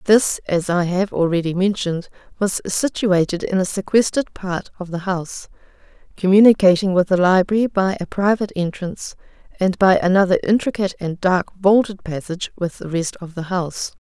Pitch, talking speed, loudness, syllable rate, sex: 185 Hz, 160 wpm, -19 LUFS, 5.4 syllables/s, female